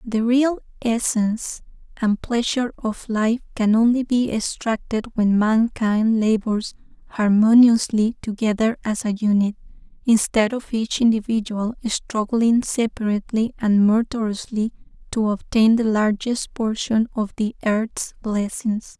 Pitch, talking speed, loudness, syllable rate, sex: 225 Hz, 115 wpm, -20 LUFS, 4.1 syllables/s, female